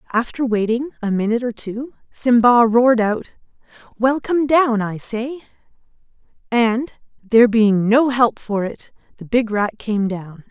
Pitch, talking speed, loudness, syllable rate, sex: 230 Hz, 150 wpm, -18 LUFS, 4.3 syllables/s, female